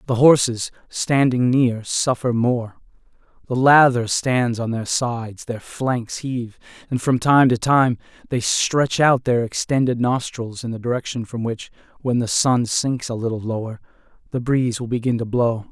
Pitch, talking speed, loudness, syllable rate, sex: 120 Hz, 170 wpm, -20 LUFS, 4.5 syllables/s, male